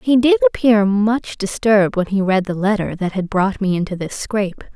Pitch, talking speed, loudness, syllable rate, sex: 200 Hz, 215 wpm, -17 LUFS, 5.1 syllables/s, female